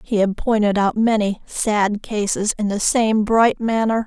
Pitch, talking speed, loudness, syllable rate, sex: 215 Hz, 175 wpm, -19 LUFS, 4.1 syllables/s, female